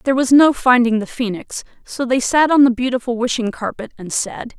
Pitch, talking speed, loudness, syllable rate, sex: 245 Hz, 210 wpm, -16 LUFS, 5.4 syllables/s, female